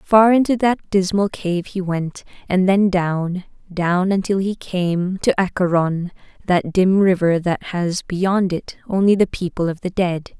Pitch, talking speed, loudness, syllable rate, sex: 185 Hz, 165 wpm, -19 LUFS, 4.1 syllables/s, female